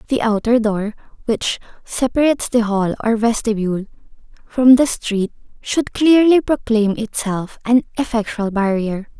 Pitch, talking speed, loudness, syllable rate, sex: 225 Hz, 125 wpm, -17 LUFS, 4.5 syllables/s, female